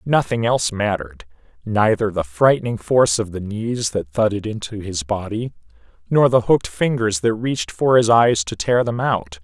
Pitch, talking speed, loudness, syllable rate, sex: 110 Hz, 170 wpm, -19 LUFS, 5.0 syllables/s, male